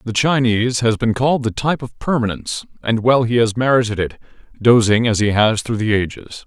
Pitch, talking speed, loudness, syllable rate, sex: 115 Hz, 205 wpm, -17 LUFS, 5.7 syllables/s, male